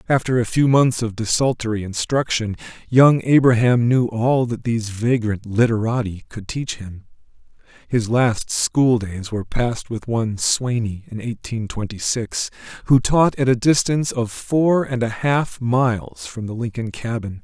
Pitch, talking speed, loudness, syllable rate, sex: 115 Hz, 160 wpm, -20 LUFS, 4.5 syllables/s, male